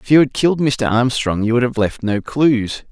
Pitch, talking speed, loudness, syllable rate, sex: 125 Hz, 245 wpm, -17 LUFS, 5.0 syllables/s, male